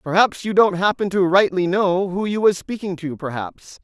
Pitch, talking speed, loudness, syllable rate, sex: 185 Hz, 205 wpm, -19 LUFS, 4.9 syllables/s, male